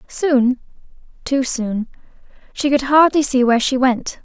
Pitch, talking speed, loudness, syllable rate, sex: 260 Hz, 140 wpm, -17 LUFS, 4.3 syllables/s, female